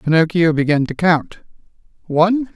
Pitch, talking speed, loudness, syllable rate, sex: 170 Hz, 115 wpm, -16 LUFS, 4.9 syllables/s, male